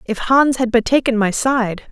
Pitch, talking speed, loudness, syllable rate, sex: 240 Hz, 220 wpm, -16 LUFS, 4.6 syllables/s, female